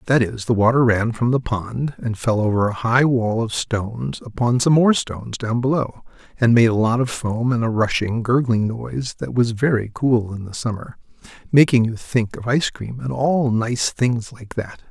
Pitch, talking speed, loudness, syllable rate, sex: 120 Hz, 205 wpm, -20 LUFS, 4.7 syllables/s, male